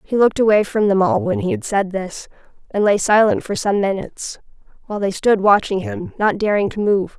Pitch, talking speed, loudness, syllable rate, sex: 205 Hz, 215 wpm, -17 LUFS, 5.5 syllables/s, female